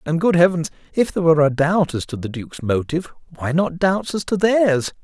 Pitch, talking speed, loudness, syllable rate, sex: 165 Hz, 225 wpm, -19 LUFS, 5.8 syllables/s, male